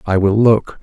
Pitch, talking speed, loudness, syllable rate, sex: 105 Hz, 215 wpm, -13 LUFS, 4.3 syllables/s, male